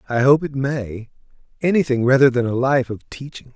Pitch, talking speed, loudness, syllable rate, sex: 130 Hz, 185 wpm, -18 LUFS, 5.2 syllables/s, male